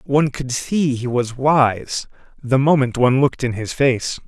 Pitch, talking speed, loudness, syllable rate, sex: 130 Hz, 180 wpm, -18 LUFS, 4.5 syllables/s, male